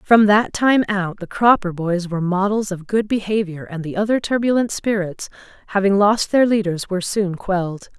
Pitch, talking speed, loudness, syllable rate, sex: 200 Hz, 180 wpm, -19 LUFS, 5.0 syllables/s, female